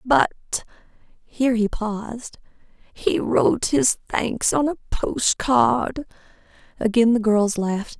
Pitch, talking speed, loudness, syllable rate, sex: 225 Hz, 115 wpm, -21 LUFS, 3.9 syllables/s, female